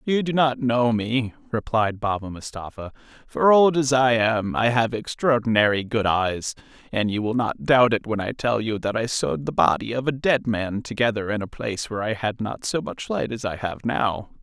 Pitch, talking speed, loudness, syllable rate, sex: 115 Hz, 215 wpm, -23 LUFS, 5.0 syllables/s, male